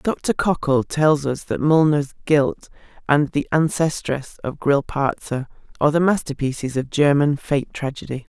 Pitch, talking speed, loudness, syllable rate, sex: 145 Hz, 135 wpm, -20 LUFS, 4.4 syllables/s, female